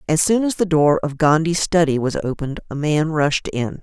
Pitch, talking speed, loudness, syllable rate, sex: 155 Hz, 220 wpm, -19 LUFS, 5.2 syllables/s, female